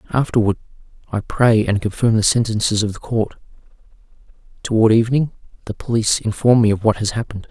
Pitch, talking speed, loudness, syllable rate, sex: 110 Hz, 160 wpm, -18 LUFS, 6.4 syllables/s, male